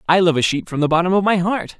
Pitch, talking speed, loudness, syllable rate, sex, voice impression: 175 Hz, 335 wpm, -17 LUFS, 6.8 syllables/s, male, masculine, adult-like, slightly clear, slightly refreshing, friendly